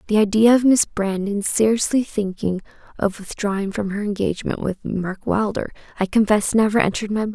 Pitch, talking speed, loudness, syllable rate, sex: 205 Hz, 170 wpm, -20 LUFS, 5.5 syllables/s, female